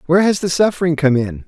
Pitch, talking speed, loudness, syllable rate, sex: 160 Hz, 245 wpm, -16 LUFS, 6.9 syllables/s, male